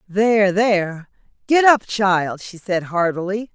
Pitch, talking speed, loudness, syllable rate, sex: 200 Hz, 135 wpm, -18 LUFS, 4.0 syllables/s, female